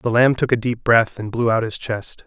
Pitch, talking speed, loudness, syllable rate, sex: 115 Hz, 290 wpm, -19 LUFS, 4.9 syllables/s, male